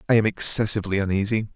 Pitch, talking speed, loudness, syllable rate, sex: 105 Hz, 155 wpm, -21 LUFS, 7.6 syllables/s, male